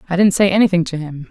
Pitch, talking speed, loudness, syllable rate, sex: 180 Hz, 275 wpm, -15 LUFS, 7.2 syllables/s, female